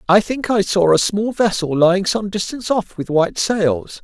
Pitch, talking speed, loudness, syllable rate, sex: 195 Hz, 210 wpm, -17 LUFS, 4.9 syllables/s, male